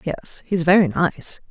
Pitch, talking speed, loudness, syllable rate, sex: 170 Hz, 160 wpm, -19 LUFS, 3.8 syllables/s, female